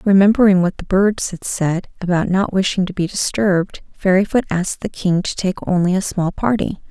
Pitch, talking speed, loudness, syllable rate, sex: 190 Hz, 190 wpm, -17 LUFS, 5.4 syllables/s, female